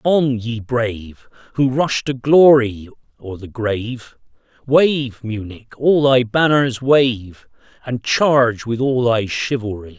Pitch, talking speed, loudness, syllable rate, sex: 120 Hz, 130 wpm, -17 LUFS, 3.6 syllables/s, male